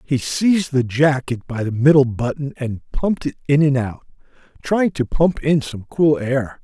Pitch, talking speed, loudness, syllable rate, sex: 135 Hz, 190 wpm, -19 LUFS, 4.5 syllables/s, male